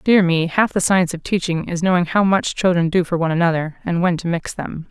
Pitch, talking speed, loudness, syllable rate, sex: 175 Hz, 255 wpm, -18 LUFS, 5.8 syllables/s, female